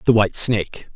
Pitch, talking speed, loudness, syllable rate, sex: 105 Hz, 190 wpm, -16 LUFS, 6.3 syllables/s, male